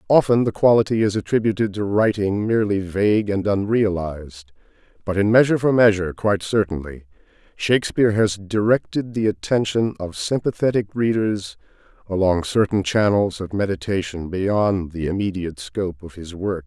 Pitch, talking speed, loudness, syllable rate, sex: 100 Hz, 135 wpm, -20 LUFS, 5.3 syllables/s, male